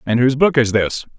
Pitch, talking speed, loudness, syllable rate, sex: 125 Hz, 255 wpm, -16 LUFS, 6.0 syllables/s, male